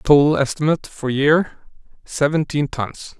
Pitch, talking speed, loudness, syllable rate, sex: 145 Hz, 115 wpm, -19 LUFS, 4.6 syllables/s, male